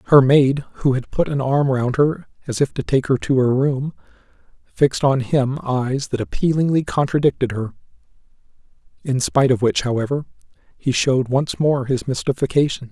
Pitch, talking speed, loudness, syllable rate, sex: 135 Hz, 165 wpm, -19 LUFS, 5.2 syllables/s, male